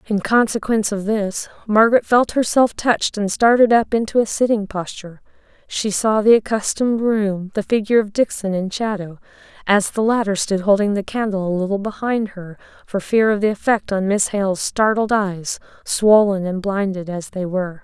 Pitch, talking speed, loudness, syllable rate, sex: 205 Hz, 180 wpm, -18 LUFS, 5.2 syllables/s, female